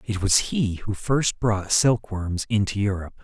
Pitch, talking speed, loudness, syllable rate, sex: 105 Hz, 185 wpm, -23 LUFS, 4.3 syllables/s, male